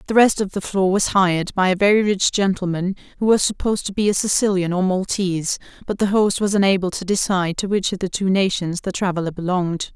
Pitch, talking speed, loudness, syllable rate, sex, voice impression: 190 Hz, 225 wpm, -19 LUFS, 6.1 syllables/s, female, very feminine, slightly adult-like, thin, tensed, slightly powerful, slightly dark, slightly hard, clear, fluent, slightly raspy, cool, very intellectual, slightly refreshing, slightly sincere, calm, slightly friendly, slightly reassuring, slightly unique, slightly elegant, wild, slightly sweet, lively, strict, slightly intense, slightly sharp, slightly light